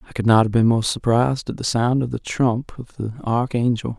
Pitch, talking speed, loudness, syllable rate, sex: 120 Hz, 240 wpm, -20 LUFS, 5.3 syllables/s, male